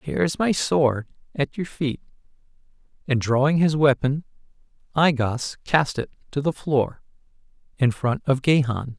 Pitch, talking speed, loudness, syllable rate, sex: 140 Hz, 145 wpm, -22 LUFS, 4.5 syllables/s, male